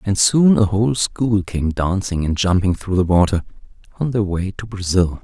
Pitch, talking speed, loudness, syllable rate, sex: 100 Hz, 195 wpm, -18 LUFS, 4.8 syllables/s, male